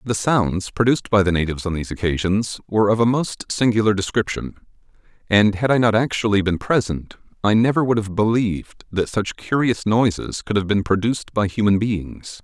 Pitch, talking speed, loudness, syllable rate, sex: 105 Hz, 185 wpm, -20 LUFS, 5.5 syllables/s, male